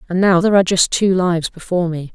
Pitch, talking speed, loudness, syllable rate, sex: 180 Hz, 250 wpm, -16 LUFS, 7.1 syllables/s, female